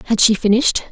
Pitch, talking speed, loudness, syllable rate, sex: 220 Hz, 195 wpm, -14 LUFS, 7.6 syllables/s, female